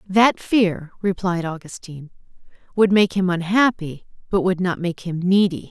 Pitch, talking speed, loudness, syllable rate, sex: 185 Hz, 145 wpm, -20 LUFS, 4.6 syllables/s, female